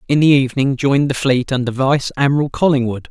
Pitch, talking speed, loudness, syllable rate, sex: 135 Hz, 195 wpm, -16 LUFS, 6.1 syllables/s, male